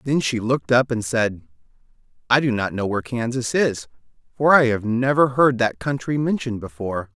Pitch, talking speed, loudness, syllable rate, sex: 120 Hz, 185 wpm, -20 LUFS, 5.5 syllables/s, male